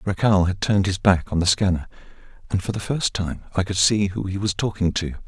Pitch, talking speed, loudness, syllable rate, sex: 95 Hz, 240 wpm, -22 LUFS, 5.7 syllables/s, male